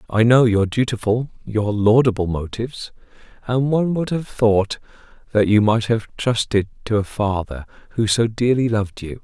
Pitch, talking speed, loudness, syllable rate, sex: 110 Hz, 160 wpm, -19 LUFS, 4.9 syllables/s, male